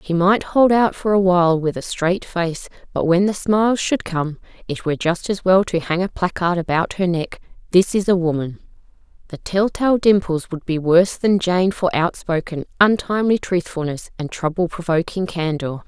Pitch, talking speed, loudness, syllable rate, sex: 180 Hz, 185 wpm, -19 LUFS, 5.0 syllables/s, female